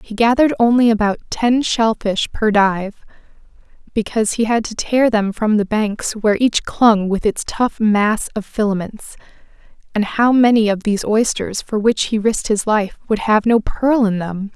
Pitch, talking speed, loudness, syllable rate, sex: 220 Hz, 180 wpm, -17 LUFS, 4.7 syllables/s, female